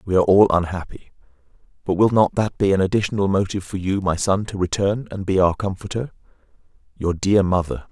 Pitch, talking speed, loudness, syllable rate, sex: 95 Hz, 190 wpm, -20 LUFS, 5.9 syllables/s, male